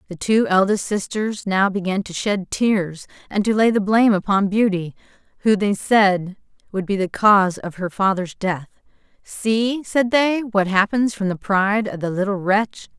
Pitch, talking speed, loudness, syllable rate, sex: 200 Hz, 180 wpm, -19 LUFS, 4.6 syllables/s, female